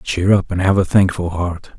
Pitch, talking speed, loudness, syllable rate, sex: 90 Hz, 235 wpm, -17 LUFS, 4.7 syllables/s, male